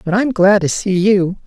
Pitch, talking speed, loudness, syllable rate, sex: 195 Hz, 245 wpm, -14 LUFS, 4.5 syllables/s, male